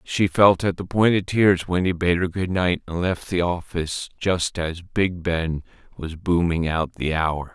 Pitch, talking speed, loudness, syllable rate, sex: 85 Hz, 205 wpm, -22 LUFS, 4.1 syllables/s, male